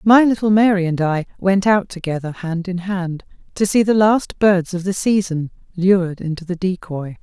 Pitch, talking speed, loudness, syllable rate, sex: 185 Hz, 190 wpm, -18 LUFS, 4.8 syllables/s, female